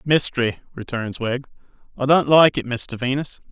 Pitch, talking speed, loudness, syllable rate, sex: 130 Hz, 155 wpm, -20 LUFS, 4.8 syllables/s, male